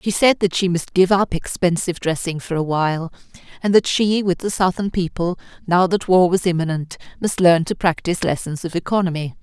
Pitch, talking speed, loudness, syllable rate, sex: 175 Hz, 195 wpm, -19 LUFS, 5.6 syllables/s, female